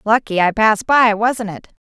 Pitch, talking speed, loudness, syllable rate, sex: 215 Hz, 195 wpm, -15 LUFS, 4.9 syllables/s, female